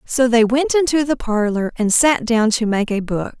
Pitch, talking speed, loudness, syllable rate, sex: 240 Hz, 230 wpm, -17 LUFS, 4.6 syllables/s, female